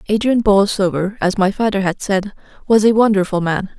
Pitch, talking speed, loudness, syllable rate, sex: 200 Hz, 175 wpm, -16 LUFS, 5.3 syllables/s, female